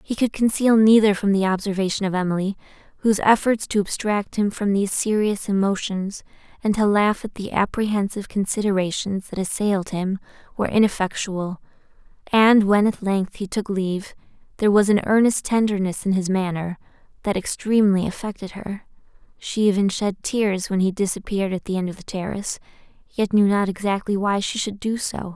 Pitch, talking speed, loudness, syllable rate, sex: 200 Hz, 170 wpm, -21 LUFS, 5.5 syllables/s, female